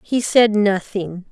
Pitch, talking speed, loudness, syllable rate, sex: 205 Hz, 135 wpm, -17 LUFS, 3.4 syllables/s, female